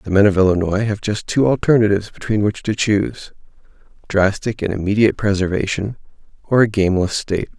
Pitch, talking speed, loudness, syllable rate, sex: 105 Hz, 160 wpm, -18 LUFS, 6.1 syllables/s, male